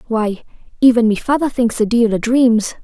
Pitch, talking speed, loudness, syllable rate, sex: 230 Hz, 190 wpm, -15 LUFS, 5.0 syllables/s, female